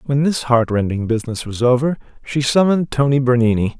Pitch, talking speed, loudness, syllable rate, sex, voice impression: 130 Hz, 160 wpm, -17 LUFS, 5.9 syllables/s, male, very masculine, slightly old, thick, relaxed, powerful, bright, soft, clear, fluent, raspy, cool, intellectual, slightly refreshing, sincere, very calm, friendly, slightly reassuring, unique, slightly elegant, wild, slightly sweet, lively, kind, slightly intense